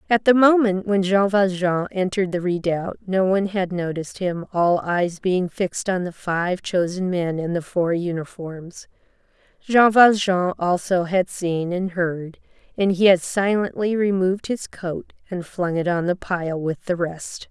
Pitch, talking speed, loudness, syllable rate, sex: 185 Hz, 170 wpm, -21 LUFS, 4.3 syllables/s, female